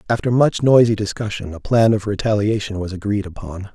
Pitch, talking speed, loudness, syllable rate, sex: 105 Hz, 175 wpm, -18 LUFS, 5.6 syllables/s, male